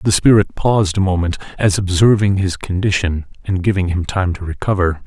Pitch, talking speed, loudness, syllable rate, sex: 95 Hz, 180 wpm, -16 LUFS, 5.5 syllables/s, male